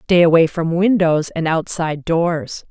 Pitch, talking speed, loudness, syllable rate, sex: 165 Hz, 155 wpm, -17 LUFS, 4.2 syllables/s, female